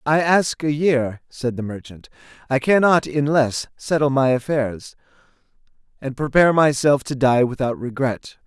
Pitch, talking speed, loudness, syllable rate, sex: 140 Hz, 150 wpm, -19 LUFS, 4.5 syllables/s, male